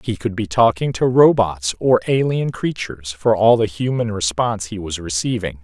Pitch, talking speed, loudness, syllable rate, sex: 105 Hz, 180 wpm, -18 LUFS, 5.1 syllables/s, male